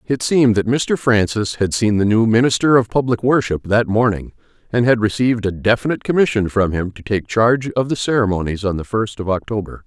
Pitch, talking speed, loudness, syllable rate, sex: 110 Hz, 205 wpm, -17 LUFS, 5.8 syllables/s, male